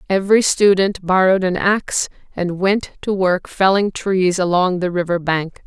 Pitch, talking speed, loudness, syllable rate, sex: 185 Hz, 160 wpm, -17 LUFS, 4.6 syllables/s, female